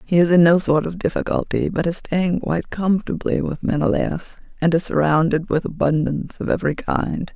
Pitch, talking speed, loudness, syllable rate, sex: 170 Hz, 180 wpm, -20 LUFS, 5.6 syllables/s, female